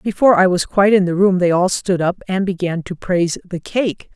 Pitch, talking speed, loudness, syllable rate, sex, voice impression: 185 Hz, 245 wpm, -17 LUFS, 5.6 syllables/s, female, feminine, adult-like, clear, sincere, slightly friendly, reassuring